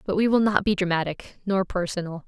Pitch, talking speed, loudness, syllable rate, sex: 190 Hz, 210 wpm, -24 LUFS, 5.7 syllables/s, female